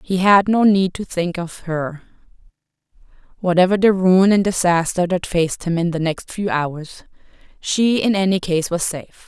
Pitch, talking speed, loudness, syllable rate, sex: 180 Hz, 175 wpm, -18 LUFS, 4.7 syllables/s, female